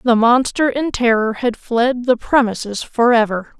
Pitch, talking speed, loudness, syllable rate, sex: 235 Hz, 150 wpm, -16 LUFS, 4.3 syllables/s, female